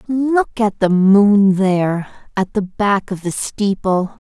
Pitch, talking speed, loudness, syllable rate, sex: 200 Hz, 155 wpm, -16 LUFS, 3.5 syllables/s, female